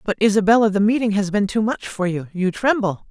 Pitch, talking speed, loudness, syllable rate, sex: 210 Hz, 230 wpm, -19 LUFS, 5.8 syllables/s, female